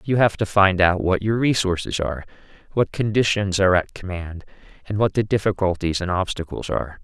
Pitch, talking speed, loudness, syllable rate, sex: 95 Hz, 180 wpm, -21 LUFS, 5.6 syllables/s, male